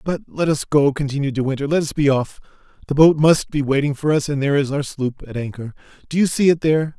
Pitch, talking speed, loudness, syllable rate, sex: 145 Hz, 250 wpm, -19 LUFS, 6.2 syllables/s, male